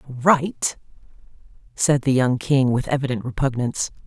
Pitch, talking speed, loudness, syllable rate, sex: 130 Hz, 120 wpm, -21 LUFS, 5.0 syllables/s, female